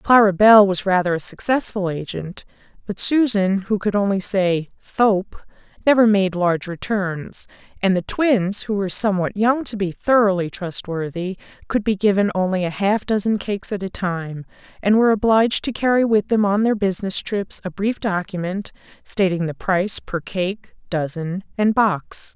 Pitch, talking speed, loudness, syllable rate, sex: 195 Hz, 165 wpm, -19 LUFS, 4.9 syllables/s, female